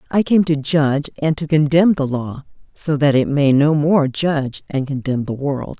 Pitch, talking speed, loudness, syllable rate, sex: 145 Hz, 205 wpm, -17 LUFS, 4.6 syllables/s, female